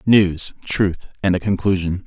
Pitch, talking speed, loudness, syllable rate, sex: 95 Hz, 145 wpm, -19 LUFS, 4.1 syllables/s, male